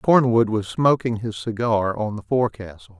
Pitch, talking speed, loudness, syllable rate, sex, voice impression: 110 Hz, 160 wpm, -21 LUFS, 4.8 syllables/s, male, masculine, slightly old, slightly soft, slightly sincere, calm, friendly, reassuring, kind